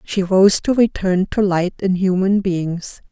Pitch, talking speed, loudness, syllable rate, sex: 190 Hz, 175 wpm, -17 LUFS, 3.8 syllables/s, female